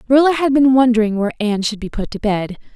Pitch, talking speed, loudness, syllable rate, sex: 235 Hz, 240 wpm, -16 LUFS, 7.4 syllables/s, female